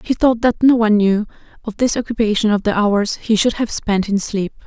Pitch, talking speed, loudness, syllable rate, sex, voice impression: 215 Hz, 230 wpm, -16 LUFS, 5.4 syllables/s, female, feminine, adult-like, relaxed, slightly soft, clear, intellectual, calm, elegant, lively, slightly strict, sharp